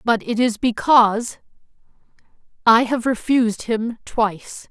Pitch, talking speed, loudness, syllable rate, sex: 230 Hz, 100 wpm, -18 LUFS, 4.2 syllables/s, female